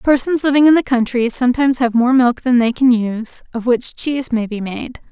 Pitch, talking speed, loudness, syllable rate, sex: 250 Hz, 225 wpm, -15 LUFS, 5.5 syllables/s, female